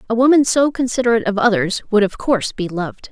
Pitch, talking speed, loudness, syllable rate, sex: 220 Hz, 210 wpm, -17 LUFS, 6.7 syllables/s, female